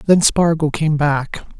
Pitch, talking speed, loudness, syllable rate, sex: 155 Hz, 150 wpm, -16 LUFS, 3.5 syllables/s, male